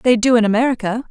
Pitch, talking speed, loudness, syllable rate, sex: 235 Hz, 215 wpm, -16 LUFS, 6.9 syllables/s, female